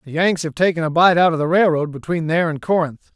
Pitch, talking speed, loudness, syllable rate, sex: 165 Hz, 265 wpm, -18 LUFS, 6.3 syllables/s, male